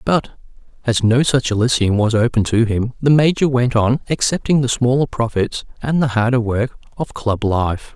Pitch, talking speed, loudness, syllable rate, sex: 120 Hz, 180 wpm, -17 LUFS, 4.9 syllables/s, male